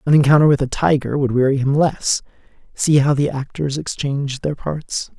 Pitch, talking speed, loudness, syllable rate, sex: 140 Hz, 185 wpm, -18 LUFS, 5.1 syllables/s, male